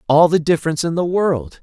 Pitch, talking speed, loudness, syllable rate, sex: 160 Hz, 220 wpm, -17 LUFS, 6.2 syllables/s, male